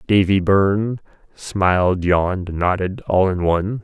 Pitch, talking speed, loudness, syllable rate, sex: 95 Hz, 95 wpm, -18 LUFS, 4.2 syllables/s, male